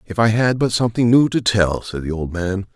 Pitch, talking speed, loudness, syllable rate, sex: 105 Hz, 260 wpm, -18 LUFS, 5.4 syllables/s, male